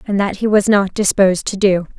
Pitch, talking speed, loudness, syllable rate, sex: 200 Hz, 240 wpm, -15 LUFS, 5.7 syllables/s, female